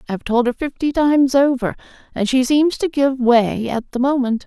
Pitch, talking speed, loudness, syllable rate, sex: 260 Hz, 215 wpm, -17 LUFS, 5.1 syllables/s, female